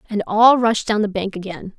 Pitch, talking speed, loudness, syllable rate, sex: 210 Hz, 235 wpm, -17 LUFS, 5.0 syllables/s, female